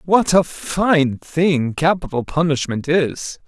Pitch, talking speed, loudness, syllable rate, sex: 160 Hz, 120 wpm, -18 LUFS, 3.3 syllables/s, male